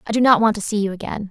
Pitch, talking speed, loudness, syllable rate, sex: 210 Hz, 365 wpm, -18 LUFS, 7.6 syllables/s, female